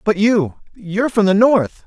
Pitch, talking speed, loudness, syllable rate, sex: 205 Hz, 160 wpm, -16 LUFS, 4.3 syllables/s, male